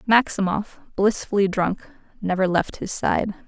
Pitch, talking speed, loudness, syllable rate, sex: 200 Hz, 120 wpm, -22 LUFS, 4.3 syllables/s, female